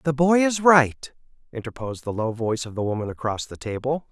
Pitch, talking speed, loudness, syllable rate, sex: 130 Hz, 205 wpm, -22 LUFS, 5.8 syllables/s, male